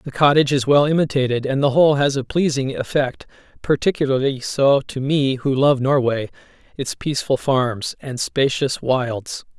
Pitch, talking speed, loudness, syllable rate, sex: 135 Hz, 150 wpm, -19 LUFS, 4.8 syllables/s, male